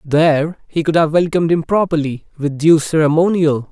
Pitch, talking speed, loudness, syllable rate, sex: 155 Hz, 160 wpm, -15 LUFS, 5.3 syllables/s, male